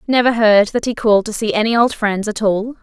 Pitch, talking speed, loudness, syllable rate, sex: 220 Hz, 255 wpm, -15 LUFS, 5.7 syllables/s, female